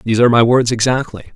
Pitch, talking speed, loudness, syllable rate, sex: 120 Hz, 220 wpm, -13 LUFS, 7.3 syllables/s, male